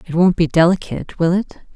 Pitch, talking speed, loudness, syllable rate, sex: 175 Hz, 205 wpm, -16 LUFS, 6.6 syllables/s, female